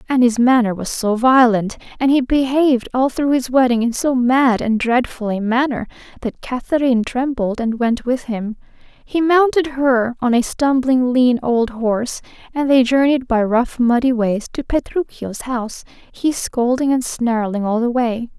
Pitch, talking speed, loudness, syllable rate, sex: 245 Hz, 175 wpm, -17 LUFS, 4.5 syllables/s, female